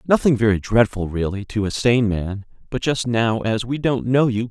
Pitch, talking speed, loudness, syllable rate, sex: 115 Hz, 215 wpm, -20 LUFS, 4.9 syllables/s, male